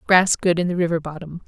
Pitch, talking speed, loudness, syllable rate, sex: 170 Hz, 245 wpm, -20 LUFS, 6.1 syllables/s, female